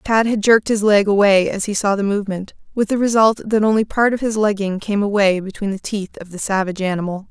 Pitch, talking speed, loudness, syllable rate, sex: 205 Hz, 240 wpm, -17 LUFS, 6.1 syllables/s, female